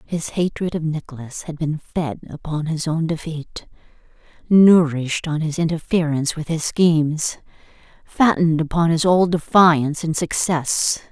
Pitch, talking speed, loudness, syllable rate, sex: 160 Hz, 135 wpm, -19 LUFS, 4.6 syllables/s, female